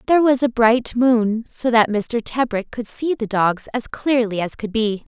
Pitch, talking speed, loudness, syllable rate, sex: 230 Hz, 210 wpm, -19 LUFS, 4.4 syllables/s, female